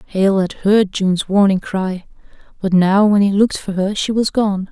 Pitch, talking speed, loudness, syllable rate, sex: 195 Hz, 205 wpm, -16 LUFS, 4.7 syllables/s, female